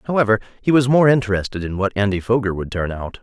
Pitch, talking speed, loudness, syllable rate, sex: 110 Hz, 225 wpm, -19 LUFS, 6.4 syllables/s, male